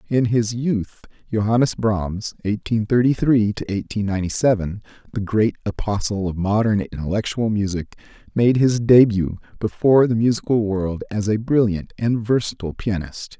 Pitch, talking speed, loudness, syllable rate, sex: 105 Hz, 145 wpm, -20 LUFS, 4.1 syllables/s, male